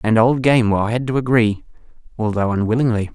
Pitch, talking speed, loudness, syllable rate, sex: 115 Hz, 150 wpm, -17 LUFS, 6.0 syllables/s, male